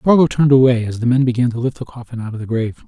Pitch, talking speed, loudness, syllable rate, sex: 125 Hz, 315 wpm, -16 LUFS, 7.4 syllables/s, male